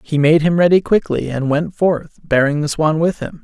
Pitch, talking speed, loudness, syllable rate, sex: 160 Hz, 225 wpm, -16 LUFS, 4.9 syllables/s, male